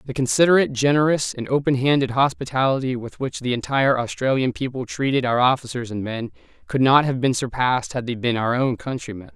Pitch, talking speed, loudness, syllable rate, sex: 130 Hz, 185 wpm, -21 LUFS, 6.0 syllables/s, male